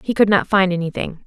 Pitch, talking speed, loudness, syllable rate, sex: 190 Hz, 240 wpm, -18 LUFS, 6.0 syllables/s, female